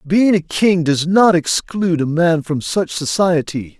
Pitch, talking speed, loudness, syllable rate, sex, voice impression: 170 Hz, 175 wpm, -16 LUFS, 4.1 syllables/s, male, masculine, middle-aged, slightly thick, slightly tensed, powerful, slightly halting, raspy, mature, friendly, wild, lively, strict, intense